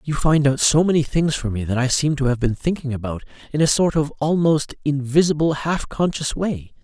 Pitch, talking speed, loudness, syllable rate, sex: 145 Hz, 220 wpm, -20 LUFS, 5.3 syllables/s, male